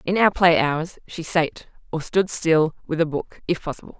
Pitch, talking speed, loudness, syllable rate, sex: 165 Hz, 210 wpm, -22 LUFS, 4.6 syllables/s, female